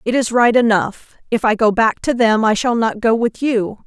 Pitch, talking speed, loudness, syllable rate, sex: 230 Hz, 250 wpm, -16 LUFS, 4.7 syllables/s, female